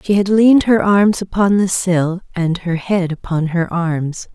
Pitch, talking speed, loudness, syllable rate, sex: 185 Hz, 195 wpm, -16 LUFS, 4.2 syllables/s, female